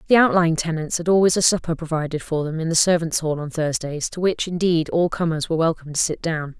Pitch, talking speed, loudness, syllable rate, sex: 165 Hz, 235 wpm, -21 LUFS, 6.3 syllables/s, female